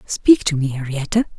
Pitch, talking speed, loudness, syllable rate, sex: 170 Hz, 175 wpm, -18 LUFS, 5.3 syllables/s, female